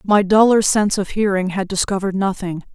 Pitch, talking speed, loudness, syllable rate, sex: 195 Hz, 175 wpm, -17 LUFS, 6.0 syllables/s, female